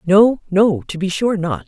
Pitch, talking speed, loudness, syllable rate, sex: 190 Hz, 215 wpm, -17 LUFS, 4.2 syllables/s, female